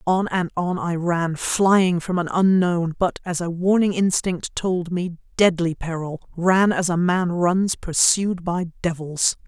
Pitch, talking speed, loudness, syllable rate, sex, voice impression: 175 Hz, 150 wpm, -21 LUFS, 3.8 syllables/s, female, feminine, middle-aged, tensed, powerful, hard, clear, slightly fluent, intellectual, slightly calm, strict, sharp